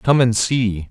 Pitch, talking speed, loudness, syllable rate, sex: 115 Hz, 200 wpm, -17 LUFS, 3.5 syllables/s, male